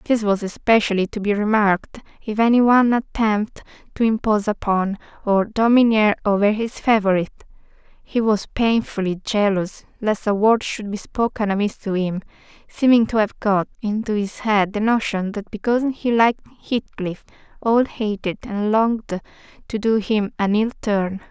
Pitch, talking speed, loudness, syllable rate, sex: 215 Hz, 155 wpm, -20 LUFS, 5.1 syllables/s, female